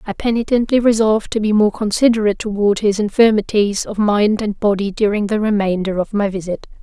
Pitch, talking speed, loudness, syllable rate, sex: 210 Hz, 175 wpm, -16 LUFS, 5.8 syllables/s, female